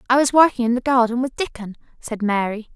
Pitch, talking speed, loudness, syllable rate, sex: 240 Hz, 220 wpm, -19 LUFS, 6.1 syllables/s, female